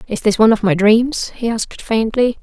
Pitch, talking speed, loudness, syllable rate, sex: 220 Hz, 220 wpm, -15 LUFS, 5.3 syllables/s, female